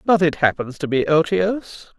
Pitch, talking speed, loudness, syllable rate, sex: 165 Hz, 180 wpm, -19 LUFS, 5.0 syllables/s, male